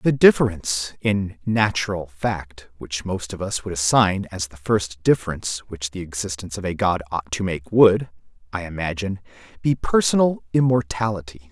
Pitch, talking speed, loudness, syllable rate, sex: 95 Hz, 155 wpm, -22 LUFS, 5.1 syllables/s, male